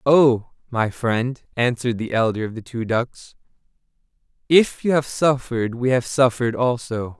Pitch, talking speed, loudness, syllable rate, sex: 120 Hz, 150 wpm, -21 LUFS, 4.6 syllables/s, male